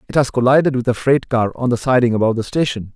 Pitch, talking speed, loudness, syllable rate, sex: 125 Hz, 265 wpm, -17 LUFS, 6.9 syllables/s, male